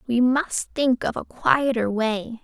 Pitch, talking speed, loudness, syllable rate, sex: 240 Hz, 175 wpm, -22 LUFS, 3.8 syllables/s, female